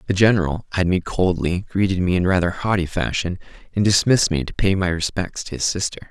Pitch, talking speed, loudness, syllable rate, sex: 90 Hz, 205 wpm, -20 LUFS, 5.9 syllables/s, male